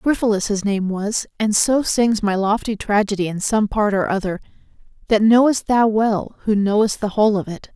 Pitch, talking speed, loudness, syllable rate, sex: 210 Hz, 195 wpm, -18 LUFS, 5.2 syllables/s, female